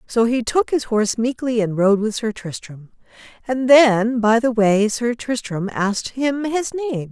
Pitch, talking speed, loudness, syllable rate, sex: 230 Hz, 185 wpm, -18 LUFS, 4.3 syllables/s, female